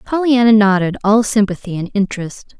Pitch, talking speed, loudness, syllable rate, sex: 210 Hz, 140 wpm, -14 LUFS, 5.5 syllables/s, female